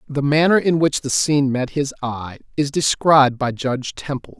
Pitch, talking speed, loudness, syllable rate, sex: 140 Hz, 190 wpm, -18 LUFS, 5.0 syllables/s, male